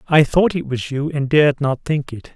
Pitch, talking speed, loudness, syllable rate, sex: 145 Hz, 255 wpm, -18 LUFS, 5.1 syllables/s, male